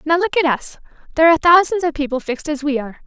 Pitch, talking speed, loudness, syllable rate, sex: 305 Hz, 235 wpm, -17 LUFS, 7.7 syllables/s, female